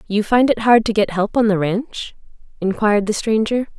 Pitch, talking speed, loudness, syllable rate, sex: 215 Hz, 205 wpm, -17 LUFS, 5.2 syllables/s, female